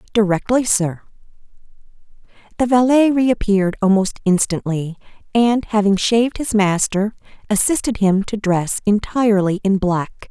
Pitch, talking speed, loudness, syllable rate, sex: 210 Hz, 115 wpm, -17 LUFS, 4.8 syllables/s, female